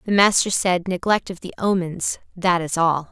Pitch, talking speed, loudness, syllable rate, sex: 180 Hz, 195 wpm, -20 LUFS, 4.7 syllables/s, female